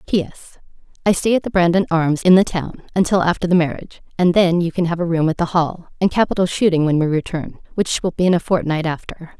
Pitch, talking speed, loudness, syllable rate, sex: 175 Hz, 235 wpm, -18 LUFS, 6.1 syllables/s, female